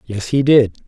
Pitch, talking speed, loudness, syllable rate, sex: 125 Hz, 205 wpm, -15 LUFS, 4.4 syllables/s, male